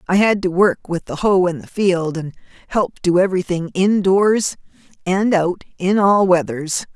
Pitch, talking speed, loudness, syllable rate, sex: 185 Hz, 180 wpm, -17 LUFS, 4.5 syllables/s, female